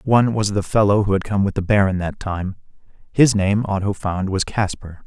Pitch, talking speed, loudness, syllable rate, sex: 100 Hz, 215 wpm, -19 LUFS, 5.2 syllables/s, male